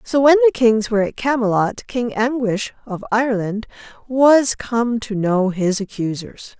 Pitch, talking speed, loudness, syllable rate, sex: 225 Hz, 155 wpm, -18 LUFS, 4.4 syllables/s, female